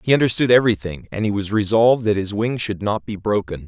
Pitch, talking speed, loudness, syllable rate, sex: 105 Hz, 230 wpm, -19 LUFS, 6.2 syllables/s, male